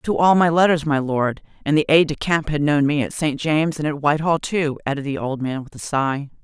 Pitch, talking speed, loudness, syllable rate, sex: 150 Hz, 260 wpm, -20 LUFS, 5.6 syllables/s, female